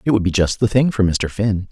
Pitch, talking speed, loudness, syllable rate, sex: 100 Hz, 315 wpm, -18 LUFS, 5.6 syllables/s, male